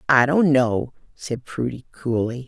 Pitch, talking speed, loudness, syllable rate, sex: 130 Hz, 145 wpm, -21 LUFS, 3.9 syllables/s, female